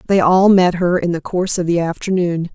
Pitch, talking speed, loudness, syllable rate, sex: 175 Hz, 235 wpm, -16 LUFS, 5.6 syllables/s, female